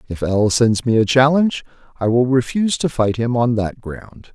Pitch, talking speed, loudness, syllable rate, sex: 125 Hz, 195 wpm, -17 LUFS, 5.0 syllables/s, male